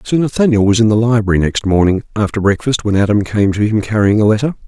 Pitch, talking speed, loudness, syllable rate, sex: 105 Hz, 230 wpm, -14 LUFS, 6.4 syllables/s, male